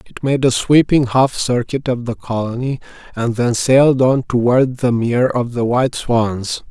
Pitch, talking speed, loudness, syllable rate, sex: 125 Hz, 180 wpm, -16 LUFS, 4.6 syllables/s, male